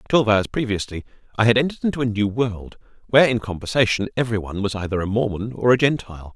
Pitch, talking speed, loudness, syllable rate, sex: 110 Hz, 210 wpm, -21 LUFS, 7.2 syllables/s, male